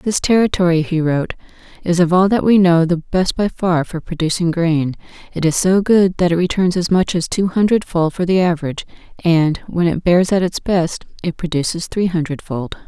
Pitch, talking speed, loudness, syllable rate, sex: 175 Hz, 200 wpm, -16 LUFS, 5.2 syllables/s, female